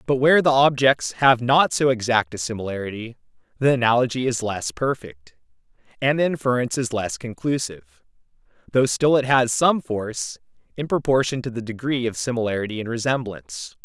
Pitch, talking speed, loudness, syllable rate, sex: 120 Hz, 155 wpm, -21 LUFS, 5.6 syllables/s, male